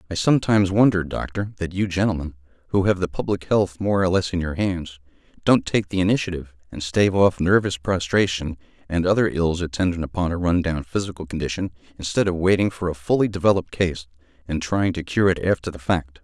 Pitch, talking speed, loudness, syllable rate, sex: 90 Hz, 195 wpm, -22 LUFS, 6.0 syllables/s, male